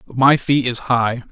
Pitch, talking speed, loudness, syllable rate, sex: 125 Hz, 185 wpm, -17 LUFS, 3.6 syllables/s, male